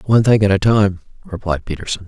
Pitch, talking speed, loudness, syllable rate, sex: 100 Hz, 200 wpm, -16 LUFS, 6.1 syllables/s, female